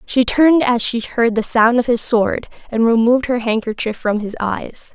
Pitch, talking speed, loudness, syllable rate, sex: 235 Hz, 205 wpm, -16 LUFS, 4.8 syllables/s, female